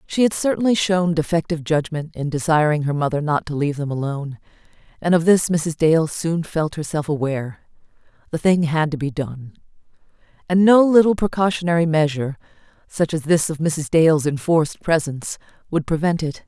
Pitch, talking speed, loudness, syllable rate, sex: 160 Hz, 165 wpm, -19 LUFS, 5.6 syllables/s, female